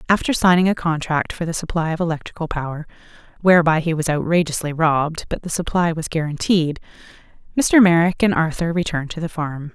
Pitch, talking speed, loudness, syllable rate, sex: 165 Hz, 170 wpm, -19 LUFS, 6.0 syllables/s, female